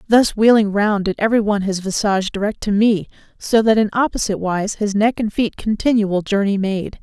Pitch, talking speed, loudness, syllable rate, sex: 210 Hz, 195 wpm, -17 LUFS, 5.6 syllables/s, female